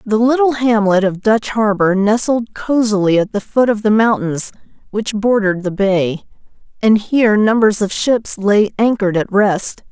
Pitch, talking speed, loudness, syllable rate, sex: 215 Hz, 165 wpm, -15 LUFS, 4.6 syllables/s, female